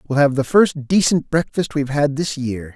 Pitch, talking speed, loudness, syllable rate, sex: 145 Hz, 220 wpm, -18 LUFS, 5.1 syllables/s, male